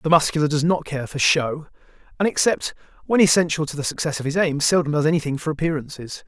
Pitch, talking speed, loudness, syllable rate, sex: 155 Hz, 210 wpm, -21 LUFS, 6.4 syllables/s, male